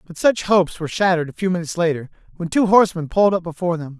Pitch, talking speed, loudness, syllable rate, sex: 175 Hz, 240 wpm, -19 LUFS, 7.9 syllables/s, male